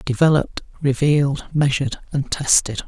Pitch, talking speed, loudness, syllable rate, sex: 140 Hz, 105 wpm, -19 LUFS, 5.4 syllables/s, male